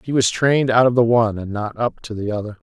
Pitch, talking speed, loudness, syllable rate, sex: 115 Hz, 290 wpm, -19 LUFS, 6.3 syllables/s, male